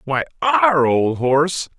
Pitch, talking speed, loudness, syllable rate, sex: 150 Hz, 135 wpm, -17 LUFS, 4.3 syllables/s, male